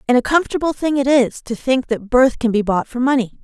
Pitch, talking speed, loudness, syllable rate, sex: 250 Hz, 260 wpm, -17 LUFS, 5.9 syllables/s, female